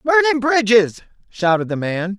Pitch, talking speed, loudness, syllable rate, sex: 225 Hz, 135 wpm, -17 LUFS, 7.2 syllables/s, male